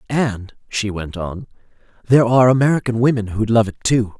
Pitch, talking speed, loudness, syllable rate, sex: 115 Hz, 170 wpm, -17 LUFS, 5.6 syllables/s, male